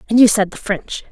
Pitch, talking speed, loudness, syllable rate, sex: 210 Hz, 270 wpm, -16 LUFS, 5.8 syllables/s, female